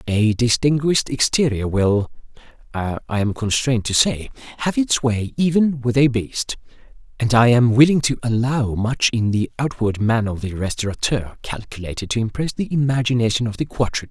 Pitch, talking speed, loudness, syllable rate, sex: 120 Hz, 160 wpm, -19 LUFS, 5.1 syllables/s, male